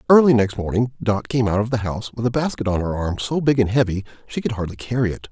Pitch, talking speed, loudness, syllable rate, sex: 110 Hz, 270 wpm, -21 LUFS, 6.5 syllables/s, male